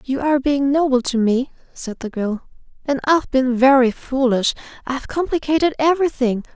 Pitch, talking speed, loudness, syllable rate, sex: 265 Hz, 155 wpm, -18 LUFS, 5.4 syllables/s, female